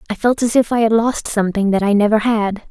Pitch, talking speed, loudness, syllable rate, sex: 220 Hz, 265 wpm, -16 LUFS, 6.2 syllables/s, female